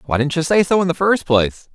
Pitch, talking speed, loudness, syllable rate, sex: 160 Hz, 310 wpm, -17 LUFS, 6.3 syllables/s, male